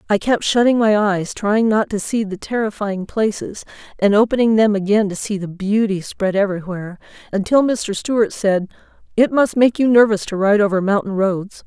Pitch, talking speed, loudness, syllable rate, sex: 210 Hz, 185 wpm, -17 LUFS, 5.1 syllables/s, female